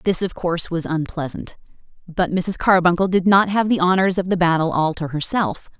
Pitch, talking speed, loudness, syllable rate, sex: 175 Hz, 195 wpm, -19 LUFS, 5.2 syllables/s, female